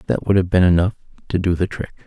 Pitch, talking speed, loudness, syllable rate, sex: 90 Hz, 260 wpm, -18 LUFS, 7.1 syllables/s, male